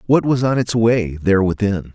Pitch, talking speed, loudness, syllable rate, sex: 105 Hz, 215 wpm, -17 LUFS, 5.0 syllables/s, male